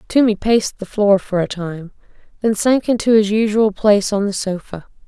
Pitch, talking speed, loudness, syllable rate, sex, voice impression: 205 Hz, 190 wpm, -17 LUFS, 5.2 syllables/s, female, feminine, adult-like, slightly relaxed, weak, soft, slightly muffled, calm, slightly friendly, reassuring, kind, slightly modest